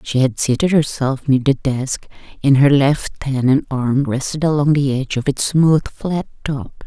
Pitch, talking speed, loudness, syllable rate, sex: 140 Hz, 190 wpm, -17 LUFS, 4.4 syllables/s, female